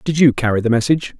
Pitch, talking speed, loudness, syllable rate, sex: 130 Hz, 250 wpm, -16 LUFS, 7.4 syllables/s, male